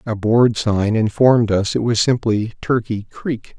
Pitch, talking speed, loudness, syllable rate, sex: 110 Hz, 170 wpm, -17 LUFS, 4.2 syllables/s, male